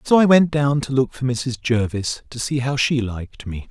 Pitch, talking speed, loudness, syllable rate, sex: 130 Hz, 245 wpm, -20 LUFS, 4.8 syllables/s, male